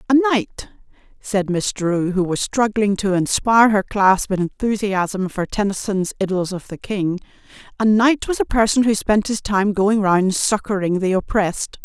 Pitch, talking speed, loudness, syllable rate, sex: 205 Hz, 170 wpm, -19 LUFS, 4.5 syllables/s, female